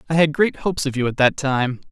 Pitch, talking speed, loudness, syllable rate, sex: 145 Hz, 280 wpm, -19 LUFS, 6.1 syllables/s, male